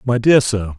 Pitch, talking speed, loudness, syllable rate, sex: 110 Hz, 230 wpm, -15 LUFS, 4.8 syllables/s, male